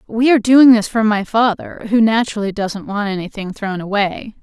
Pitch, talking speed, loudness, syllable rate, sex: 215 Hz, 190 wpm, -15 LUFS, 5.3 syllables/s, female